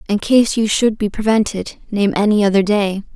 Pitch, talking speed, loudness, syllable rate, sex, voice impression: 210 Hz, 190 wpm, -16 LUFS, 5.1 syllables/s, female, very feminine, young, very thin, tensed, powerful, very bright, soft, very clear, very fluent, slightly raspy, very cute, intellectual, very refreshing, sincere, calm, very friendly, reassuring, very unique, elegant, slightly wild, very sweet, lively, kind, slightly modest, light